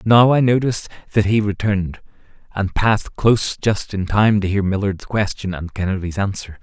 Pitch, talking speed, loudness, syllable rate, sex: 100 Hz, 170 wpm, -19 LUFS, 5.2 syllables/s, male